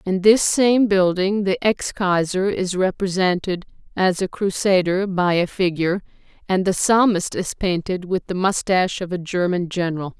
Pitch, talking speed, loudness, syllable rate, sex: 185 Hz, 160 wpm, -20 LUFS, 4.6 syllables/s, female